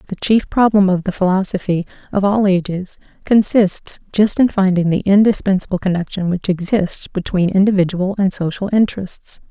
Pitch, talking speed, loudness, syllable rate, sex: 190 Hz, 145 wpm, -16 LUFS, 5.1 syllables/s, female